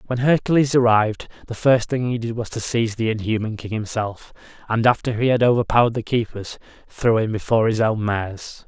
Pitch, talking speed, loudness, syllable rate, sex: 115 Hz, 195 wpm, -20 LUFS, 5.9 syllables/s, male